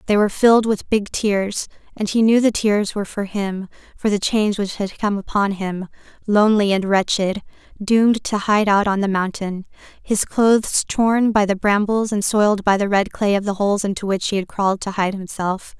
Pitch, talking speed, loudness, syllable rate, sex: 205 Hz, 210 wpm, -19 LUFS, 5.2 syllables/s, female